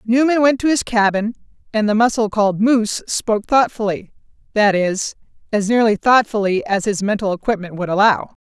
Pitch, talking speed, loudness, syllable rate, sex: 215 Hz, 165 wpm, -17 LUFS, 5.4 syllables/s, female